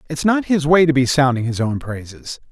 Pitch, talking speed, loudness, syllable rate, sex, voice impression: 140 Hz, 240 wpm, -17 LUFS, 5.3 syllables/s, male, masculine, adult-like, thick, tensed, slightly powerful, bright, slightly muffled, slightly raspy, cool, intellectual, friendly, reassuring, wild, lively, slightly kind